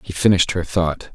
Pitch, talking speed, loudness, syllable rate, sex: 90 Hz, 210 wpm, -19 LUFS, 5.7 syllables/s, male